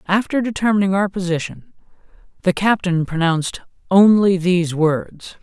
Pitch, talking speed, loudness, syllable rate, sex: 185 Hz, 110 wpm, -17 LUFS, 4.9 syllables/s, male